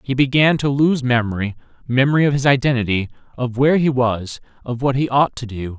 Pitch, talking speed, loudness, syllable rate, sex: 130 Hz, 185 wpm, -18 LUFS, 5.7 syllables/s, male